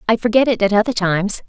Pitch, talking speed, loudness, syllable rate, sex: 210 Hz, 245 wpm, -16 LUFS, 6.9 syllables/s, female